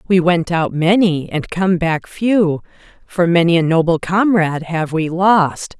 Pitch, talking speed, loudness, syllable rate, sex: 175 Hz, 165 wpm, -15 LUFS, 4.1 syllables/s, female